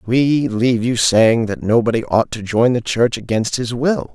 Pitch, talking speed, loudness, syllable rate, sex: 120 Hz, 205 wpm, -16 LUFS, 4.4 syllables/s, male